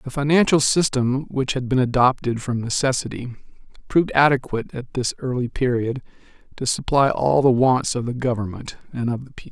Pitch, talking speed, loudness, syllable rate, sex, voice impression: 130 Hz, 170 wpm, -21 LUFS, 5.5 syllables/s, male, masculine, very middle-aged, slightly thick, cool, sincere, slightly calm